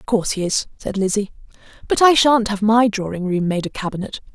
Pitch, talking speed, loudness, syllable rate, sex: 210 Hz, 220 wpm, -18 LUFS, 6.0 syllables/s, female